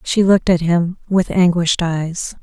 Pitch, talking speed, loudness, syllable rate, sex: 175 Hz, 175 wpm, -16 LUFS, 4.6 syllables/s, female